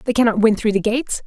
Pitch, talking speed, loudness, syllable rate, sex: 220 Hz, 285 wpm, -18 LUFS, 7.1 syllables/s, female